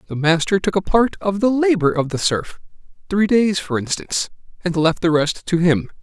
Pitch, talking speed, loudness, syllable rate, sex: 180 Hz, 190 wpm, -18 LUFS, 5.1 syllables/s, male